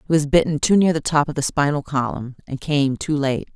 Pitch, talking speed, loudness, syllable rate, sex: 145 Hz, 255 wpm, -20 LUFS, 5.5 syllables/s, female